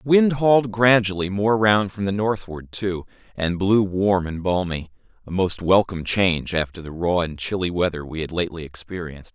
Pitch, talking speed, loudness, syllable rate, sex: 95 Hz, 185 wpm, -21 LUFS, 5.2 syllables/s, male